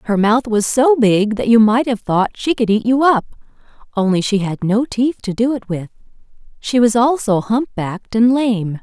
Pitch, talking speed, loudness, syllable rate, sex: 225 Hz, 205 wpm, -16 LUFS, 4.8 syllables/s, female